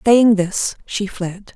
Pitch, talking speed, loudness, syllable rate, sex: 200 Hz, 155 wpm, -18 LUFS, 3.0 syllables/s, female